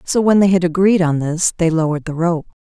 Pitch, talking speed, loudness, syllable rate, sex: 170 Hz, 250 wpm, -16 LUFS, 6.0 syllables/s, female